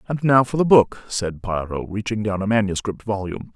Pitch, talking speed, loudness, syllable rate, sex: 105 Hz, 200 wpm, -21 LUFS, 5.7 syllables/s, male